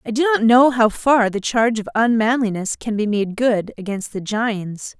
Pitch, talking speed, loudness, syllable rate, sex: 225 Hz, 205 wpm, -18 LUFS, 4.6 syllables/s, female